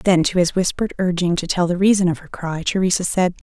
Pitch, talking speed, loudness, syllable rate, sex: 180 Hz, 240 wpm, -19 LUFS, 6.1 syllables/s, female